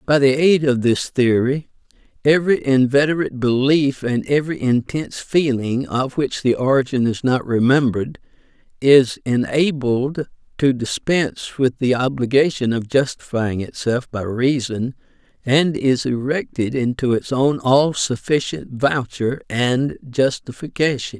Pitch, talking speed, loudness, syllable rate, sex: 130 Hz, 120 wpm, -19 LUFS, 4.3 syllables/s, male